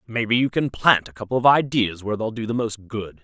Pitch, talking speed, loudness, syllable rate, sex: 115 Hz, 260 wpm, -21 LUFS, 5.8 syllables/s, male